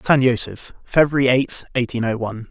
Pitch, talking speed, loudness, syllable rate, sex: 125 Hz, 170 wpm, -19 LUFS, 5.5 syllables/s, male